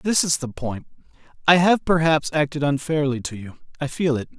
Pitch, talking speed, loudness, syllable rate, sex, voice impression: 150 Hz, 190 wpm, -21 LUFS, 5.3 syllables/s, male, masculine, slightly adult-like, slightly clear, fluent, slightly unique, slightly intense